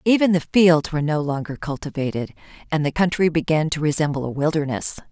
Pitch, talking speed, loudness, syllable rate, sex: 155 Hz, 175 wpm, -21 LUFS, 6.0 syllables/s, female